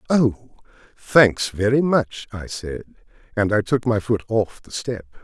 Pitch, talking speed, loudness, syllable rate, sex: 115 Hz, 160 wpm, -21 LUFS, 3.9 syllables/s, male